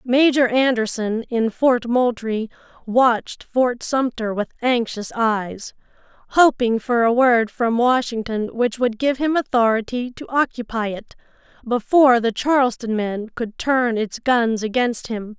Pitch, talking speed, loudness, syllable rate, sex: 235 Hz, 135 wpm, -19 LUFS, 4.1 syllables/s, female